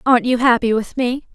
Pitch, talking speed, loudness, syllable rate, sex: 245 Hz, 225 wpm, -17 LUFS, 5.9 syllables/s, female